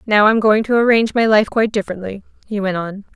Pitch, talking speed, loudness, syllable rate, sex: 210 Hz, 230 wpm, -16 LUFS, 6.7 syllables/s, female